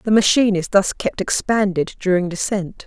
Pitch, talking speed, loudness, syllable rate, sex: 195 Hz, 165 wpm, -18 LUFS, 5.0 syllables/s, female